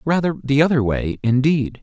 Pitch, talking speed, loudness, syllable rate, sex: 140 Hz, 165 wpm, -18 LUFS, 4.9 syllables/s, male